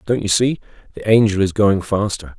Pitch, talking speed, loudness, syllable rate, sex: 105 Hz, 200 wpm, -17 LUFS, 5.2 syllables/s, male